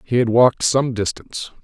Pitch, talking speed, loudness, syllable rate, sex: 120 Hz, 185 wpm, -17 LUFS, 5.6 syllables/s, male